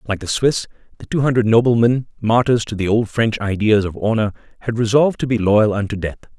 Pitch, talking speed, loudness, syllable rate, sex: 110 Hz, 205 wpm, -17 LUFS, 5.9 syllables/s, male